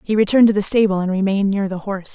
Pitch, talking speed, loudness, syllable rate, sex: 200 Hz, 280 wpm, -17 LUFS, 7.8 syllables/s, female